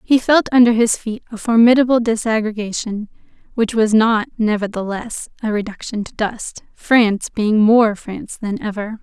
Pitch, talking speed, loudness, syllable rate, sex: 220 Hz, 145 wpm, -17 LUFS, 4.8 syllables/s, female